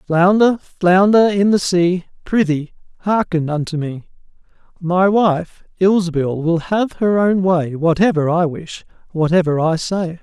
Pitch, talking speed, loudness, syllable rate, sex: 175 Hz, 135 wpm, -16 LUFS, 4.0 syllables/s, male